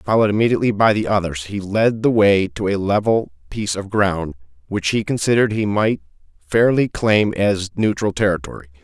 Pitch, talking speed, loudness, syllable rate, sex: 100 Hz, 170 wpm, -18 LUFS, 5.5 syllables/s, male